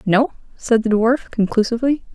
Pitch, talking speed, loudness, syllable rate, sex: 230 Hz, 140 wpm, -18 LUFS, 5.5 syllables/s, female